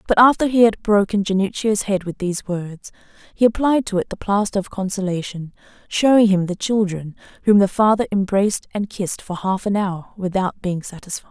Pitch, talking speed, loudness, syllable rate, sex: 200 Hz, 185 wpm, -19 LUFS, 5.4 syllables/s, female